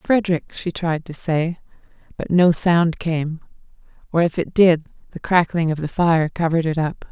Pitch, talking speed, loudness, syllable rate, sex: 165 Hz, 175 wpm, -19 LUFS, 4.8 syllables/s, female